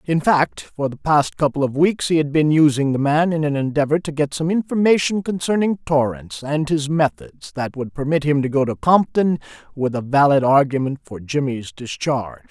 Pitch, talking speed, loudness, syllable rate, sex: 145 Hz, 195 wpm, -19 LUFS, 5.1 syllables/s, male